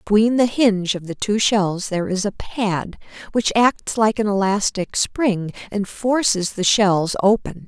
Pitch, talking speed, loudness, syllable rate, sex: 205 Hz, 170 wpm, -19 LUFS, 4.1 syllables/s, female